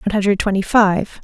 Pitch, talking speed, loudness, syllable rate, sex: 200 Hz, 195 wpm, -16 LUFS, 7.2 syllables/s, female